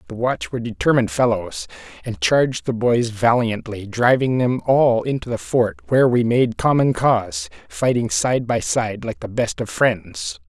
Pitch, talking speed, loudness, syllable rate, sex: 120 Hz, 170 wpm, -19 LUFS, 4.6 syllables/s, male